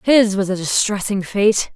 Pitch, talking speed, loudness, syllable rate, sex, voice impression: 205 Hz, 170 wpm, -17 LUFS, 4.3 syllables/s, female, very feminine, slightly young, adult-like, very thin, very tensed, very powerful, very bright, hard, very clear, very fluent, slightly raspy, cute, slightly cool, intellectual, very refreshing, sincere, slightly calm, very friendly, very reassuring, very unique, elegant, wild, sweet, very lively, kind, intense, very light